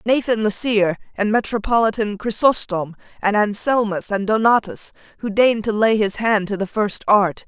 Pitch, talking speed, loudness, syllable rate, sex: 210 Hz, 160 wpm, -19 LUFS, 4.8 syllables/s, female